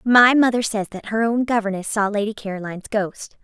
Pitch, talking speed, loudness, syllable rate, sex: 215 Hz, 190 wpm, -20 LUFS, 5.4 syllables/s, female